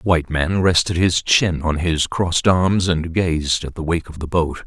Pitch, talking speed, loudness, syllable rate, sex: 85 Hz, 230 wpm, -18 LUFS, 4.6 syllables/s, male